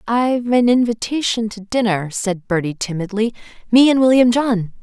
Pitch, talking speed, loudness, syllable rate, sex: 225 Hz, 150 wpm, -17 LUFS, 4.9 syllables/s, female